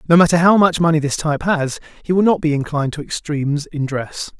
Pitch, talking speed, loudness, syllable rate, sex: 155 Hz, 230 wpm, -17 LUFS, 6.2 syllables/s, male